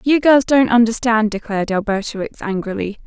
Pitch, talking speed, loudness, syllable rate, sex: 225 Hz, 155 wpm, -17 LUFS, 5.5 syllables/s, female